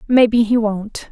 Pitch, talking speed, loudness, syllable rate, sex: 225 Hz, 160 wpm, -16 LUFS, 4.2 syllables/s, female